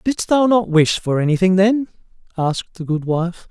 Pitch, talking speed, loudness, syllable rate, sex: 185 Hz, 190 wpm, -17 LUFS, 4.7 syllables/s, male